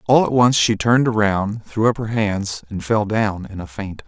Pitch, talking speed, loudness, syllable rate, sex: 105 Hz, 235 wpm, -19 LUFS, 4.4 syllables/s, male